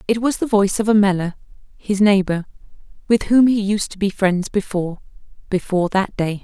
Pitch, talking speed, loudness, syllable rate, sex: 200 Hz, 170 wpm, -18 LUFS, 5.6 syllables/s, female